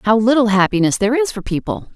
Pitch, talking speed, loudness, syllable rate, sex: 220 Hz, 215 wpm, -16 LUFS, 6.7 syllables/s, female